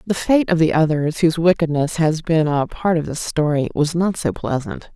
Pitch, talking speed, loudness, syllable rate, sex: 160 Hz, 220 wpm, -18 LUFS, 5.0 syllables/s, female